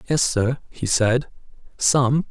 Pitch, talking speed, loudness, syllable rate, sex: 130 Hz, 130 wpm, -21 LUFS, 3.3 syllables/s, male